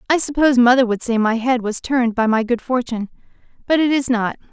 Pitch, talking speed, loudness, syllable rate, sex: 245 Hz, 225 wpm, -17 LUFS, 6.3 syllables/s, female